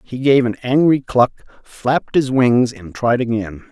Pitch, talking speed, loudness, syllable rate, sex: 125 Hz, 180 wpm, -17 LUFS, 4.2 syllables/s, male